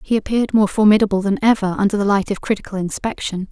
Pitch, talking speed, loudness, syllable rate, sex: 205 Hz, 205 wpm, -18 LUFS, 6.9 syllables/s, female